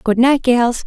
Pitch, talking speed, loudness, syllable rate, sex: 245 Hz, 205 wpm, -14 LUFS, 4.0 syllables/s, female